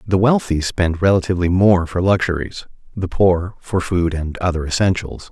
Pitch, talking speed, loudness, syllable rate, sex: 90 Hz, 160 wpm, -18 LUFS, 4.9 syllables/s, male